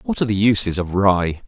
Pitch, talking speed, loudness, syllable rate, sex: 105 Hz, 245 wpm, -18 LUFS, 5.7 syllables/s, male